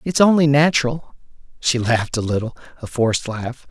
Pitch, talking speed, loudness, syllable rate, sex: 130 Hz, 145 wpm, -18 LUFS, 5.5 syllables/s, male